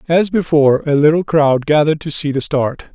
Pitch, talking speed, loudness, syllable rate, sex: 150 Hz, 205 wpm, -14 LUFS, 5.6 syllables/s, male